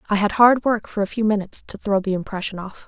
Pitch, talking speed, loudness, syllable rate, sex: 205 Hz, 270 wpm, -20 LUFS, 6.4 syllables/s, female